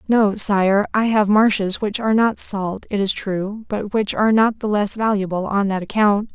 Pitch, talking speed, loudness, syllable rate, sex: 205 Hz, 210 wpm, -18 LUFS, 4.6 syllables/s, female